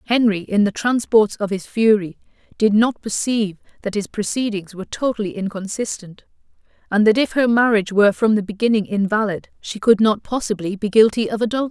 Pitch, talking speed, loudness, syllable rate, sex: 210 Hz, 175 wpm, -19 LUFS, 5.9 syllables/s, female